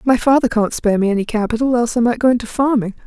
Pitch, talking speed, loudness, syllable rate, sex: 235 Hz, 255 wpm, -16 LUFS, 7.3 syllables/s, female